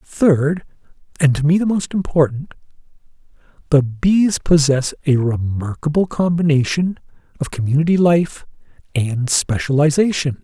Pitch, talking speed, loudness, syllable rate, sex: 150 Hz, 90 wpm, -17 LUFS, 4.5 syllables/s, male